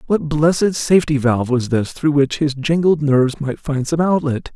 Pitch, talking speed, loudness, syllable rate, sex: 145 Hz, 200 wpm, -17 LUFS, 5.0 syllables/s, male